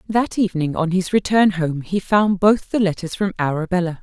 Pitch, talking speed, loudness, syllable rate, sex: 185 Hz, 195 wpm, -19 LUFS, 5.2 syllables/s, female